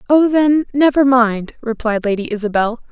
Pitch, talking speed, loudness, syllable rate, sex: 245 Hz, 145 wpm, -15 LUFS, 4.8 syllables/s, female